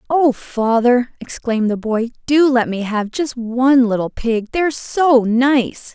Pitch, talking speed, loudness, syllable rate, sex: 245 Hz, 170 wpm, -17 LUFS, 4.2 syllables/s, female